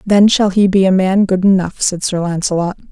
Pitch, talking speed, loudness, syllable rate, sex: 190 Hz, 225 wpm, -13 LUFS, 5.2 syllables/s, female